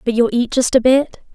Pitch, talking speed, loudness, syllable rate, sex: 245 Hz, 265 wpm, -15 LUFS, 5.4 syllables/s, female